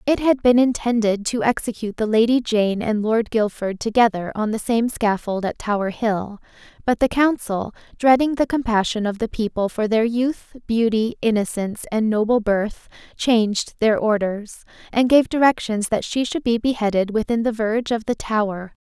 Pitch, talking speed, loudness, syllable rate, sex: 225 Hz, 170 wpm, -20 LUFS, 4.9 syllables/s, female